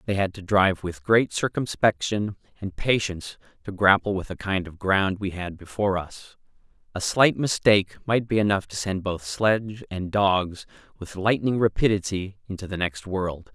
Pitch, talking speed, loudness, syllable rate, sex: 100 Hz, 175 wpm, -24 LUFS, 4.8 syllables/s, male